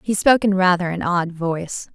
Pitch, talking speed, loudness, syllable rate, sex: 185 Hz, 215 wpm, -19 LUFS, 5.5 syllables/s, female